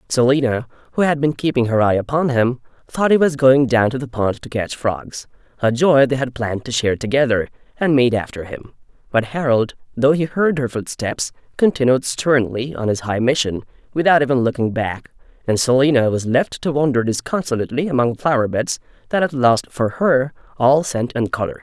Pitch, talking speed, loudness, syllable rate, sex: 130 Hz, 185 wpm, -18 LUFS, 5.3 syllables/s, male